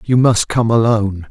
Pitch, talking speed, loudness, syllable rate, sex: 110 Hz, 185 wpm, -14 LUFS, 5.0 syllables/s, male